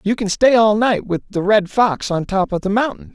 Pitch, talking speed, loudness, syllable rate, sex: 205 Hz, 265 wpm, -17 LUFS, 5.0 syllables/s, male